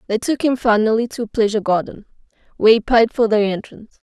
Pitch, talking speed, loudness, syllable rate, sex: 220 Hz, 205 wpm, -17 LUFS, 6.6 syllables/s, female